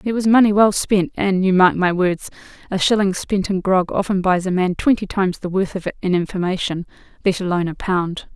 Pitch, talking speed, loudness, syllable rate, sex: 190 Hz, 225 wpm, -18 LUFS, 5.6 syllables/s, female